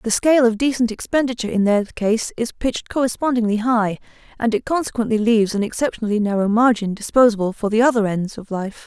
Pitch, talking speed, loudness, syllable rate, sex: 225 Hz, 185 wpm, -19 LUFS, 6.3 syllables/s, female